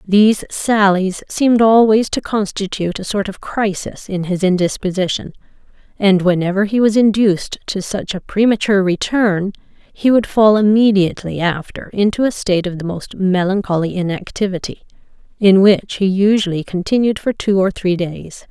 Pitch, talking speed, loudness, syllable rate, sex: 195 Hz, 150 wpm, -16 LUFS, 5.0 syllables/s, female